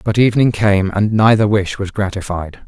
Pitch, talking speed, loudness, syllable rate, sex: 105 Hz, 180 wpm, -15 LUFS, 5.1 syllables/s, male